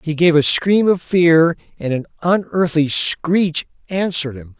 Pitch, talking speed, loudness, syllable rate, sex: 165 Hz, 155 wpm, -16 LUFS, 4.1 syllables/s, male